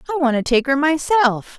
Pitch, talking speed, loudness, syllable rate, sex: 285 Hz, 225 wpm, -17 LUFS, 5.8 syllables/s, female